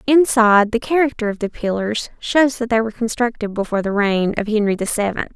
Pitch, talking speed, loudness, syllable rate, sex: 225 Hz, 200 wpm, -18 LUFS, 5.9 syllables/s, female